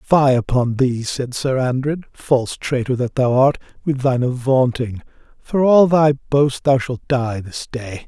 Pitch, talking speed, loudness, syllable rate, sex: 130 Hz, 170 wpm, -18 LUFS, 4.2 syllables/s, male